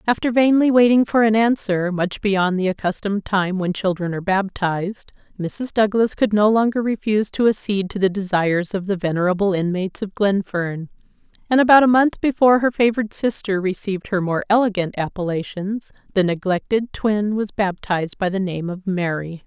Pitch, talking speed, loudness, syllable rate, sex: 200 Hz, 170 wpm, -19 LUFS, 5.4 syllables/s, female